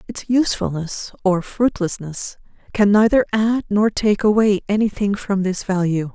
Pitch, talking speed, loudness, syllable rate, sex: 200 Hz, 135 wpm, -19 LUFS, 4.5 syllables/s, female